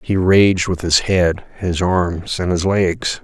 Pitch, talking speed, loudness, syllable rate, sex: 90 Hz, 185 wpm, -17 LUFS, 3.3 syllables/s, male